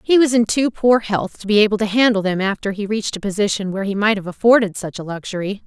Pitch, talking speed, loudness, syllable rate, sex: 205 Hz, 265 wpm, -18 LUFS, 6.5 syllables/s, female